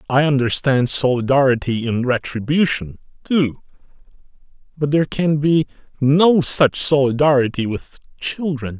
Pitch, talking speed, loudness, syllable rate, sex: 140 Hz, 100 wpm, -18 LUFS, 4.5 syllables/s, male